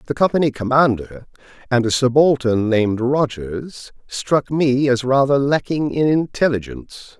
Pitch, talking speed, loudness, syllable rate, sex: 130 Hz, 125 wpm, -18 LUFS, 4.4 syllables/s, male